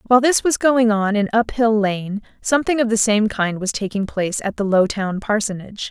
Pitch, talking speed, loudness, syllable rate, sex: 215 Hz, 205 wpm, -19 LUFS, 5.5 syllables/s, female